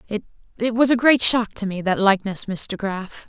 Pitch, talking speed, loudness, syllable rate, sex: 210 Hz, 200 wpm, -19 LUFS, 5.8 syllables/s, female